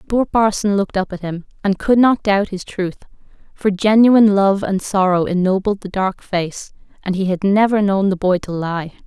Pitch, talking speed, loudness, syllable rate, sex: 195 Hz, 205 wpm, -17 LUFS, 5.0 syllables/s, female